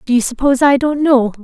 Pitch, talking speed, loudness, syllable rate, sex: 260 Hz, 250 wpm, -13 LUFS, 6.4 syllables/s, female